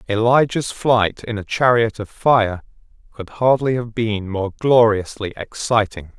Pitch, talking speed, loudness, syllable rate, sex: 110 Hz, 135 wpm, -18 LUFS, 4.0 syllables/s, male